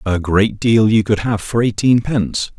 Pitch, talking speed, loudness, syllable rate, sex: 105 Hz, 185 wpm, -16 LUFS, 4.5 syllables/s, male